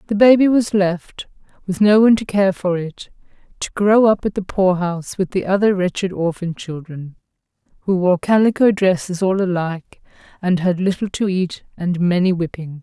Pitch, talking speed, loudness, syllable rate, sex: 190 Hz, 175 wpm, -17 LUFS, 5.1 syllables/s, female